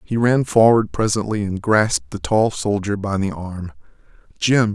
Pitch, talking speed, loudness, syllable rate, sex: 105 Hz, 165 wpm, -19 LUFS, 4.4 syllables/s, male